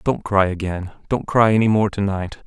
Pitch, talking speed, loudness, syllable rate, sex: 100 Hz, 220 wpm, -19 LUFS, 5.0 syllables/s, male